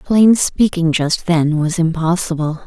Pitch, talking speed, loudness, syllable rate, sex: 170 Hz, 135 wpm, -15 LUFS, 4.0 syllables/s, female